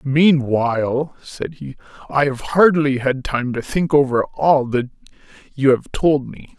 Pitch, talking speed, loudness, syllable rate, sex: 140 Hz, 155 wpm, -18 LUFS, 3.9 syllables/s, male